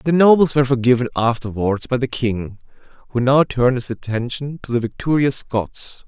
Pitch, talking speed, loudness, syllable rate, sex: 125 Hz, 170 wpm, -18 LUFS, 5.3 syllables/s, male